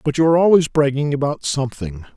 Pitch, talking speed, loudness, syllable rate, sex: 140 Hz, 165 wpm, -17 LUFS, 6.0 syllables/s, male